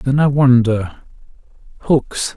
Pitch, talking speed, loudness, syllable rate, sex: 125 Hz, 75 wpm, -15 LUFS, 3.5 syllables/s, male